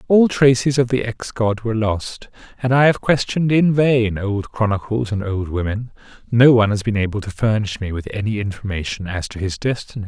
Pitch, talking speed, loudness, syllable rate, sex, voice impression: 110 Hz, 205 wpm, -19 LUFS, 5.4 syllables/s, male, very masculine, middle-aged, slightly thick, cool, sincere, slightly friendly, slightly kind